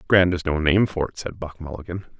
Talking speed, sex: 245 wpm, male